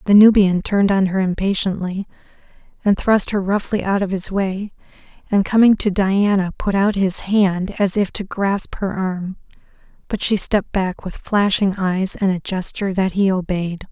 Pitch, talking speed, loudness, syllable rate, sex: 195 Hz, 175 wpm, -18 LUFS, 4.6 syllables/s, female